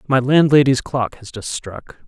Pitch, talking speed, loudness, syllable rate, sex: 130 Hz, 175 wpm, -17 LUFS, 4.3 syllables/s, male